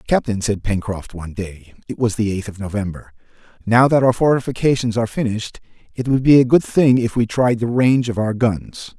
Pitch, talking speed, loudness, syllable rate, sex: 115 Hz, 205 wpm, -18 LUFS, 5.7 syllables/s, male